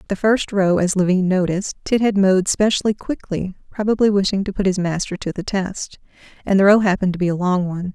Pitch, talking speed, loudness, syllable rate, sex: 190 Hz, 220 wpm, -19 LUFS, 6.1 syllables/s, female